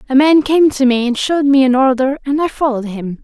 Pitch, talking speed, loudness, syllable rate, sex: 270 Hz, 260 wpm, -13 LUFS, 6.1 syllables/s, female